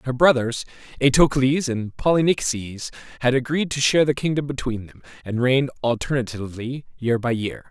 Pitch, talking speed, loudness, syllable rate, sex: 130 Hz, 150 wpm, -22 LUFS, 5.1 syllables/s, male